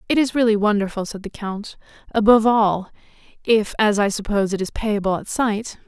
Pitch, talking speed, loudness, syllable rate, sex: 210 Hz, 185 wpm, -20 LUFS, 5.6 syllables/s, female